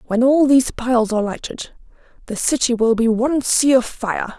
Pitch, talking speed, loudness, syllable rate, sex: 245 Hz, 190 wpm, -17 LUFS, 5.4 syllables/s, female